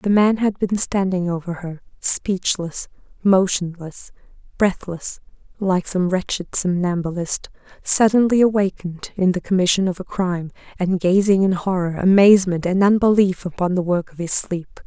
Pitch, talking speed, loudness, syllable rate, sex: 185 Hz, 140 wpm, -19 LUFS, 4.8 syllables/s, female